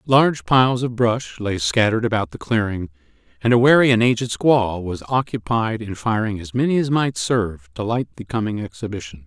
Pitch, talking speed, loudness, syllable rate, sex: 110 Hz, 190 wpm, -20 LUFS, 5.4 syllables/s, male